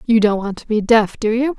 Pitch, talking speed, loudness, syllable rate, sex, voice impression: 220 Hz, 300 wpm, -17 LUFS, 5.4 syllables/s, female, intellectual, calm, slightly friendly, elegant, slightly lively, modest